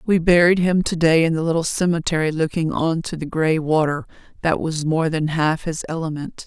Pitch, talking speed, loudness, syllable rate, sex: 160 Hz, 205 wpm, -20 LUFS, 5.2 syllables/s, female